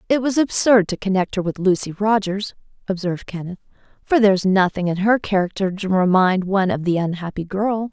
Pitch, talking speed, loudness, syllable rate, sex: 195 Hz, 190 wpm, -19 LUFS, 5.8 syllables/s, female